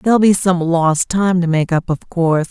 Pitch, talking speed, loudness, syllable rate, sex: 175 Hz, 240 wpm, -15 LUFS, 4.9 syllables/s, female